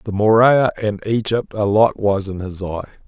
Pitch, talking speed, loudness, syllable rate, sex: 105 Hz, 175 wpm, -17 LUFS, 5.6 syllables/s, male